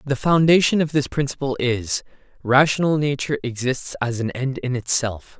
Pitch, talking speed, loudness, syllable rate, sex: 135 Hz, 155 wpm, -20 LUFS, 5.0 syllables/s, male